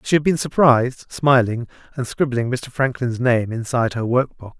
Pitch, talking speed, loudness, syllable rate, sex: 125 Hz, 170 wpm, -19 LUFS, 5.0 syllables/s, male